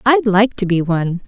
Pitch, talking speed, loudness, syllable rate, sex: 200 Hz, 235 wpm, -16 LUFS, 5.2 syllables/s, female